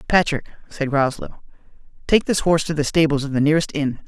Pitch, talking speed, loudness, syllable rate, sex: 150 Hz, 190 wpm, -20 LUFS, 6.3 syllables/s, male